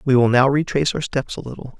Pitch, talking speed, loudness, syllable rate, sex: 135 Hz, 265 wpm, -19 LUFS, 6.5 syllables/s, male